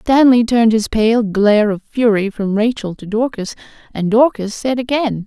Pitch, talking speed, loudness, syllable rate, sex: 225 Hz, 170 wpm, -15 LUFS, 4.7 syllables/s, female